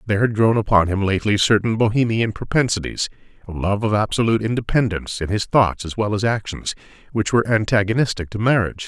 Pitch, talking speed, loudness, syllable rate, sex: 105 Hz, 160 wpm, -19 LUFS, 6.4 syllables/s, male